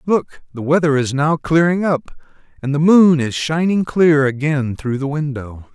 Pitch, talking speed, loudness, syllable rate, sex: 150 Hz, 180 wpm, -16 LUFS, 4.4 syllables/s, male